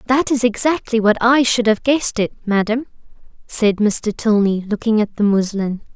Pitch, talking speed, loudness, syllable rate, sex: 225 Hz, 170 wpm, -17 LUFS, 4.9 syllables/s, female